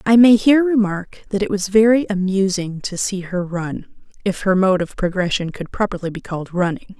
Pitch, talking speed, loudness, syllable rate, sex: 195 Hz, 195 wpm, -18 LUFS, 5.3 syllables/s, female